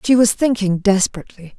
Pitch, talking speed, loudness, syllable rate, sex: 205 Hz, 150 wpm, -16 LUFS, 6.0 syllables/s, female